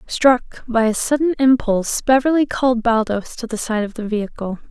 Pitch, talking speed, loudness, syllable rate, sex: 235 Hz, 180 wpm, -18 LUFS, 5.5 syllables/s, female